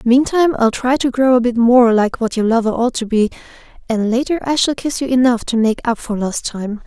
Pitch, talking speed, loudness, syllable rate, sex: 240 Hz, 245 wpm, -16 LUFS, 5.5 syllables/s, female